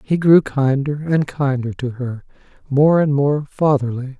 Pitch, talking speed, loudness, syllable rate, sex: 140 Hz, 155 wpm, -18 LUFS, 4.1 syllables/s, male